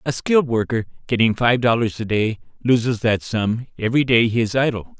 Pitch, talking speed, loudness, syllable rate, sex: 115 Hz, 190 wpm, -19 LUFS, 5.5 syllables/s, male